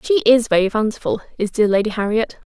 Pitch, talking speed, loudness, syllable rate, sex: 225 Hz, 190 wpm, -18 LUFS, 6.1 syllables/s, female